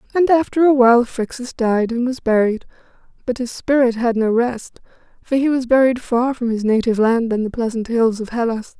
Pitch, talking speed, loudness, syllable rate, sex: 240 Hz, 200 wpm, -17 LUFS, 5.3 syllables/s, female